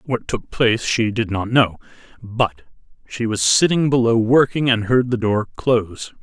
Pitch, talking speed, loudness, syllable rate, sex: 115 Hz, 175 wpm, -18 LUFS, 4.4 syllables/s, male